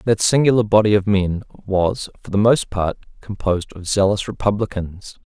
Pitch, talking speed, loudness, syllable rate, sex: 100 Hz, 160 wpm, -19 LUFS, 4.9 syllables/s, male